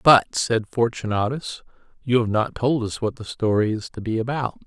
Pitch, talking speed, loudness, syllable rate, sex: 115 Hz, 195 wpm, -23 LUFS, 4.9 syllables/s, male